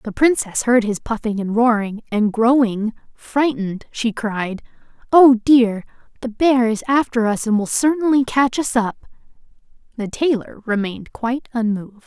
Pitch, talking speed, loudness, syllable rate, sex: 230 Hz, 150 wpm, -18 LUFS, 4.7 syllables/s, female